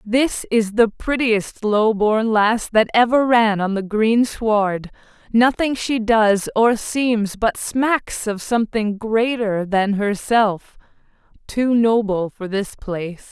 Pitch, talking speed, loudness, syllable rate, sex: 220 Hz, 140 wpm, -18 LUFS, 3.4 syllables/s, female